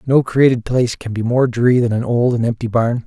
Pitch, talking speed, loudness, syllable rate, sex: 120 Hz, 255 wpm, -16 LUFS, 5.8 syllables/s, male